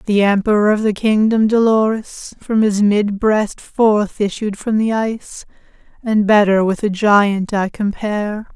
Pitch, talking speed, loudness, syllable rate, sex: 210 Hz, 155 wpm, -16 LUFS, 4.1 syllables/s, female